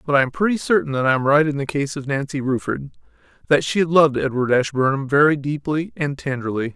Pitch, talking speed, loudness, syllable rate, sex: 140 Hz, 215 wpm, -20 LUFS, 6.2 syllables/s, male